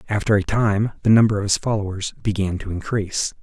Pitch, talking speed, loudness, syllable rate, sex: 100 Hz, 190 wpm, -20 LUFS, 6.0 syllables/s, male